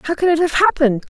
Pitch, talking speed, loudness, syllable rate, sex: 305 Hz, 260 wpm, -16 LUFS, 6.6 syllables/s, female